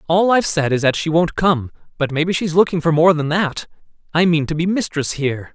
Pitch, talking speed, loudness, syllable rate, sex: 160 Hz, 225 wpm, -17 LUFS, 5.8 syllables/s, male